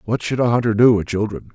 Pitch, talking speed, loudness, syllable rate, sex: 110 Hz, 270 wpm, -18 LUFS, 6.3 syllables/s, male